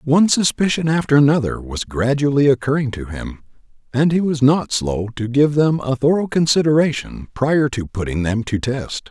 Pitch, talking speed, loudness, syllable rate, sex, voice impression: 130 Hz, 170 wpm, -18 LUFS, 5.0 syllables/s, male, masculine, slightly old, powerful, bright, clear, fluent, intellectual, calm, mature, friendly, reassuring, wild, lively, slightly strict